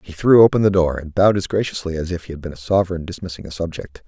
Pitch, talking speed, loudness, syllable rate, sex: 90 Hz, 280 wpm, -18 LUFS, 7.1 syllables/s, male